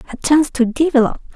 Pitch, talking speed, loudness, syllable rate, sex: 270 Hz, 175 wpm, -16 LUFS, 7.3 syllables/s, female